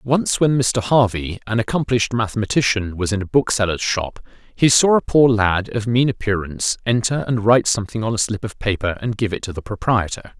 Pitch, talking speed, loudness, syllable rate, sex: 110 Hz, 200 wpm, -19 LUFS, 5.6 syllables/s, male